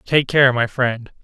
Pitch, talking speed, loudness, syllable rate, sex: 130 Hz, 195 wpm, -17 LUFS, 3.8 syllables/s, male